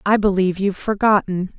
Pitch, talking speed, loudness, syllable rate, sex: 195 Hz, 150 wpm, -18 LUFS, 6.1 syllables/s, female